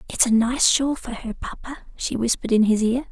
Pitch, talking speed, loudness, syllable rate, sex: 240 Hz, 230 wpm, -21 LUFS, 5.6 syllables/s, female